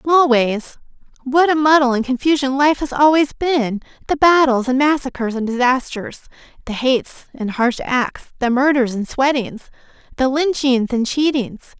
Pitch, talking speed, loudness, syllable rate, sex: 265 Hz, 140 wpm, -17 LUFS, 4.6 syllables/s, female